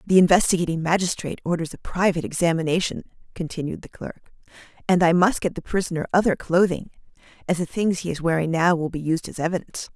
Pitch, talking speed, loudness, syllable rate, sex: 170 Hz, 180 wpm, -22 LUFS, 6.6 syllables/s, female